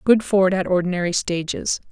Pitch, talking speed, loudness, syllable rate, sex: 185 Hz, 155 wpm, -20 LUFS, 5.2 syllables/s, female